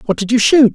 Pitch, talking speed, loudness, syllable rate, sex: 225 Hz, 325 wpm, -12 LUFS, 5.6 syllables/s, male